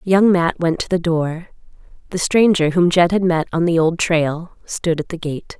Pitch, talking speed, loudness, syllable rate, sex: 170 Hz, 215 wpm, -17 LUFS, 4.4 syllables/s, female